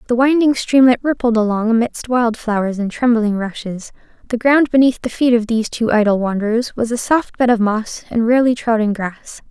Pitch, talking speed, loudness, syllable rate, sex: 230 Hz, 195 wpm, -16 LUFS, 5.3 syllables/s, female